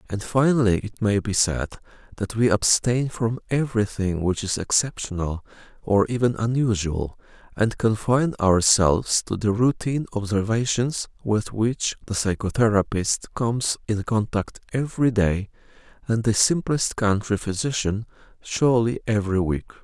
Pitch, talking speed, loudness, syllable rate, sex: 110 Hz, 125 wpm, -23 LUFS, 4.8 syllables/s, male